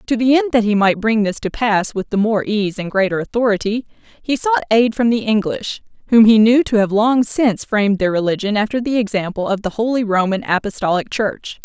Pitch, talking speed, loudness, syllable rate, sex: 215 Hz, 215 wpm, -17 LUFS, 5.5 syllables/s, female